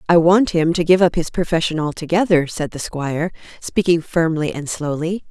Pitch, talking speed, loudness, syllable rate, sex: 165 Hz, 180 wpm, -18 LUFS, 5.2 syllables/s, female